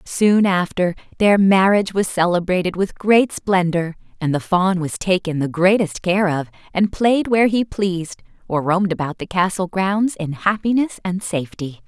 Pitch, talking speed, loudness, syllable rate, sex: 185 Hz, 165 wpm, -18 LUFS, 4.8 syllables/s, female